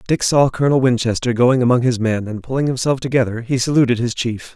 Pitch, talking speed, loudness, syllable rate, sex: 125 Hz, 210 wpm, -17 LUFS, 6.1 syllables/s, male